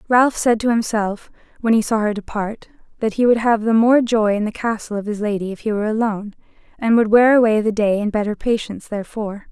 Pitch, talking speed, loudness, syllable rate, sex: 220 Hz, 225 wpm, -18 LUFS, 5.9 syllables/s, female